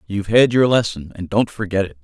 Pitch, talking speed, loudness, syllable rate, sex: 105 Hz, 235 wpm, -17 LUFS, 6.1 syllables/s, male